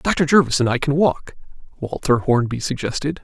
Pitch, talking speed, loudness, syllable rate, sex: 140 Hz, 165 wpm, -19 LUFS, 5.0 syllables/s, male